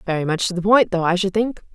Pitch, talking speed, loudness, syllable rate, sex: 190 Hz, 310 wpm, -19 LUFS, 6.6 syllables/s, female